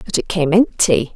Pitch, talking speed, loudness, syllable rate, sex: 175 Hz, 210 wpm, -16 LUFS, 4.9 syllables/s, female